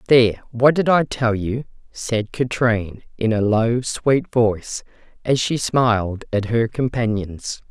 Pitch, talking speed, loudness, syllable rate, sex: 115 Hz, 150 wpm, -20 LUFS, 4.1 syllables/s, female